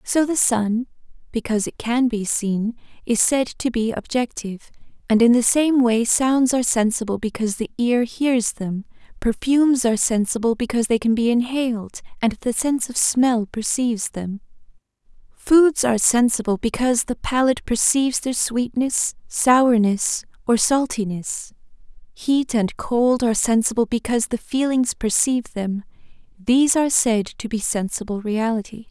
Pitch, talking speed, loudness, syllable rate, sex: 235 Hz, 145 wpm, -20 LUFS, 4.8 syllables/s, female